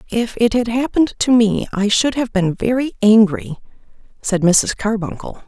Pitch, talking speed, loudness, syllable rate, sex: 215 Hz, 165 wpm, -16 LUFS, 4.7 syllables/s, female